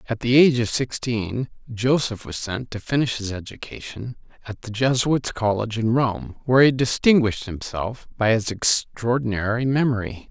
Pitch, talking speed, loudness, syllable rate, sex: 115 Hz, 150 wpm, -22 LUFS, 5.0 syllables/s, male